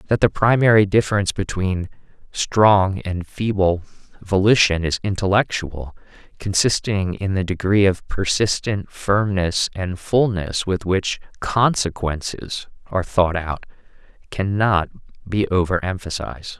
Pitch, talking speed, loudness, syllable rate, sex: 95 Hz, 110 wpm, -20 LUFS, 4.2 syllables/s, male